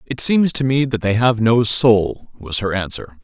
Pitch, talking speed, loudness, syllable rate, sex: 115 Hz, 225 wpm, -17 LUFS, 4.3 syllables/s, male